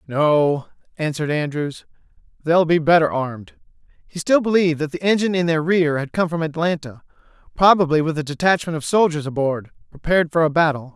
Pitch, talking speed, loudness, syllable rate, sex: 160 Hz, 165 wpm, -19 LUFS, 5.8 syllables/s, male